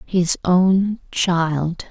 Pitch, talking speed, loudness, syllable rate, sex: 180 Hz, 95 wpm, -18 LUFS, 1.9 syllables/s, female